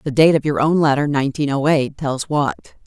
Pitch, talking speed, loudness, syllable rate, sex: 145 Hz, 230 wpm, -18 LUFS, 5.7 syllables/s, female